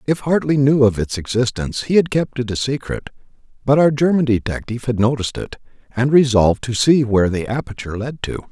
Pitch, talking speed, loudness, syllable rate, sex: 125 Hz, 195 wpm, -18 LUFS, 6.1 syllables/s, male